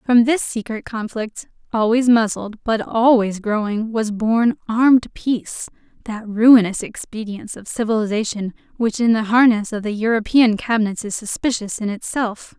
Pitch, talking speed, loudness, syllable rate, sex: 220 Hz, 145 wpm, -19 LUFS, 4.6 syllables/s, female